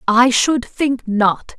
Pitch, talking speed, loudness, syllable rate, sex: 235 Hz, 150 wpm, -16 LUFS, 2.8 syllables/s, female